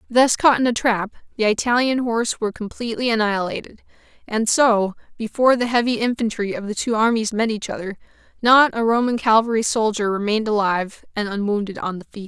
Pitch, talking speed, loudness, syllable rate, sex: 220 Hz, 175 wpm, -20 LUFS, 6.0 syllables/s, female